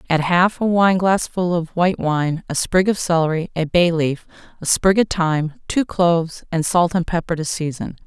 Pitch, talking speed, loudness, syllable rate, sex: 170 Hz, 195 wpm, -19 LUFS, 4.9 syllables/s, female